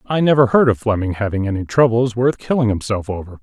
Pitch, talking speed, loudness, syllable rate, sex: 115 Hz, 210 wpm, -17 LUFS, 6.0 syllables/s, male